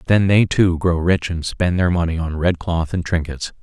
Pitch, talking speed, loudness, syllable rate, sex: 85 Hz, 230 wpm, -18 LUFS, 4.7 syllables/s, male